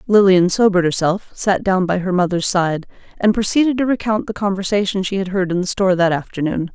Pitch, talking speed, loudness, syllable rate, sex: 190 Hz, 205 wpm, -17 LUFS, 5.9 syllables/s, female